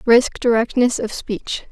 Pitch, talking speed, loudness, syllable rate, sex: 235 Hz, 140 wpm, -19 LUFS, 3.9 syllables/s, female